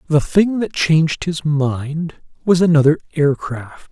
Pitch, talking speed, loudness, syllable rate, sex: 155 Hz, 140 wpm, -17 LUFS, 3.9 syllables/s, male